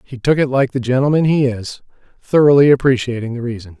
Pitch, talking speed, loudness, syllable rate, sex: 130 Hz, 190 wpm, -15 LUFS, 6.0 syllables/s, male